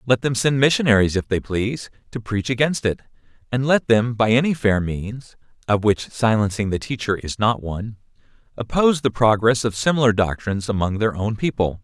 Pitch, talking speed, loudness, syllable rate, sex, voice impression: 115 Hz, 185 wpm, -20 LUFS, 4.5 syllables/s, male, masculine, adult-like, tensed, bright, clear, fluent, intellectual, slightly refreshing, calm, wild, slightly lively, slightly strict